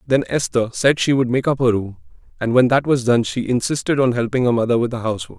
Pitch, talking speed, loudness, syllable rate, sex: 125 Hz, 255 wpm, -18 LUFS, 6.3 syllables/s, male